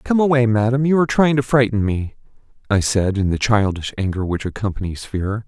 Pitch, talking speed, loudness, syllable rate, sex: 115 Hz, 195 wpm, -19 LUFS, 5.8 syllables/s, male